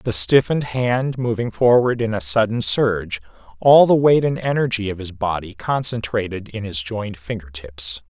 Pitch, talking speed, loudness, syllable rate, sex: 110 Hz, 160 wpm, -19 LUFS, 4.9 syllables/s, male